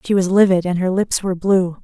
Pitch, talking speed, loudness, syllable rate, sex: 185 Hz, 260 wpm, -17 LUFS, 5.9 syllables/s, female